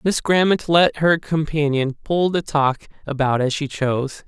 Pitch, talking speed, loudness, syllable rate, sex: 150 Hz, 170 wpm, -19 LUFS, 4.4 syllables/s, male